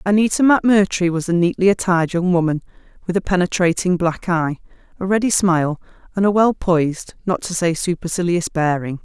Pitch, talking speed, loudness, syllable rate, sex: 180 Hz, 165 wpm, -18 LUFS, 5.7 syllables/s, female